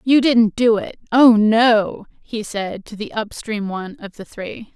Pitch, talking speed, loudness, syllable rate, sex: 220 Hz, 190 wpm, -17 LUFS, 3.9 syllables/s, female